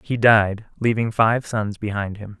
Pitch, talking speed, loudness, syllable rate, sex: 110 Hz, 175 wpm, -20 LUFS, 4.2 syllables/s, male